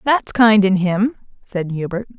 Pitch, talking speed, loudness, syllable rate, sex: 205 Hz, 165 wpm, -17 LUFS, 4.1 syllables/s, female